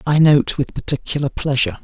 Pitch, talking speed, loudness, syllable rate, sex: 145 Hz, 165 wpm, -17 LUFS, 5.9 syllables/s, male